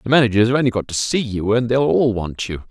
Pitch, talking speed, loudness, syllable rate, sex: 115 Hz, 290 wpm, -18 LUFS, 6.0 syllables/s, male